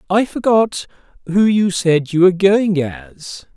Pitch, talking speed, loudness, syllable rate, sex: 185 Hz, 150 wpm, -15 LUFS, 3.8 syllables/s, male